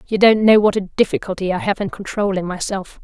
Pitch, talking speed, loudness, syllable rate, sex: 195 Hz, 220 wpm, -17 LUFS, 6.0 syllables/s, female